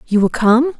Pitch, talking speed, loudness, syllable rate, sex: 240 Hz, 225 wpm, -14 LUFS, 4.8 syllables/s, female